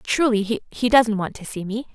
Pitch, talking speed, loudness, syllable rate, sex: 225 Hz, 215 wpm, -21 LUFS, 5.4 syllables/s, female